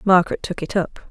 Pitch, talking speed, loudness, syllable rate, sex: 180 Hz, 215 wpm, -21 LUFS, 5.9 syllables/s, female